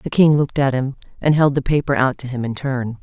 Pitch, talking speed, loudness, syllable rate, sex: 135 Hz, 280 wpm, -18 LUFS, 5.8 syllables/s, female